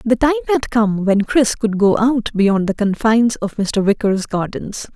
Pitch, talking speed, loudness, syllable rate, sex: 220 Hz, 195 wpm, -16 LUFS, 4.4 syllables/s, female